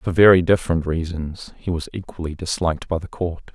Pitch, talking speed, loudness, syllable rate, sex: 85 Hz, 185 wpm, -21 LUFS, 5.5 syllables/s, male